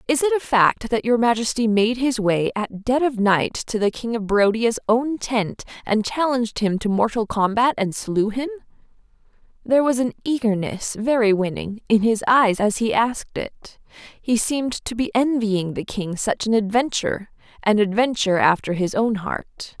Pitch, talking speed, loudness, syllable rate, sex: 225 Hz, 175 wpm, -21 LUFS, 4.8 syllables/s, female